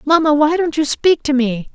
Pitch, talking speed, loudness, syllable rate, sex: 295 Hz, 240 wpm, -15 LUFS, 4.9 syllables/s, female